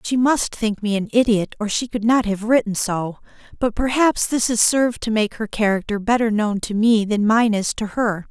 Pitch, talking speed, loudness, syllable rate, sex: 220 Hz, 225 wpm, -19 LUFS, 4.9 syllables/s, female